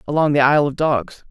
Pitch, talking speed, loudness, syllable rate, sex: 145 Hz, 230 wpm, -17 LUFS, 6.1 syllables/s, male